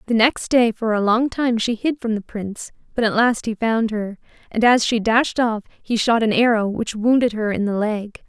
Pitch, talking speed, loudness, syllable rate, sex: 225 Hz, 240 wpm, -19 LUFS, 4.9 syllables/s, female